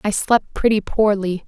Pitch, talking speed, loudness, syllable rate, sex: 205 Hz, 160 wpm, -18 LUFS, 4.4 syllables/s, female